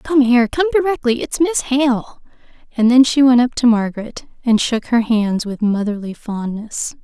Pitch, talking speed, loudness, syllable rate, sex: 240 Hz, 180 wpm, -16 LUFS, 4.7 syllables/s, female